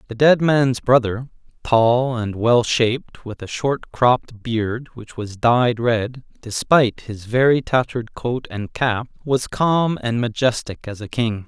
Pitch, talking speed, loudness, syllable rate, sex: 120 Hz, 160 wpm, -19 LUFS, 3.9 syllables/s, male